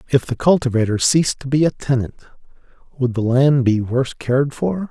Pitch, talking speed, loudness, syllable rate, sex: 130 Hz, 185 wpm, -18 LUFS, 5.6 syllables/s, male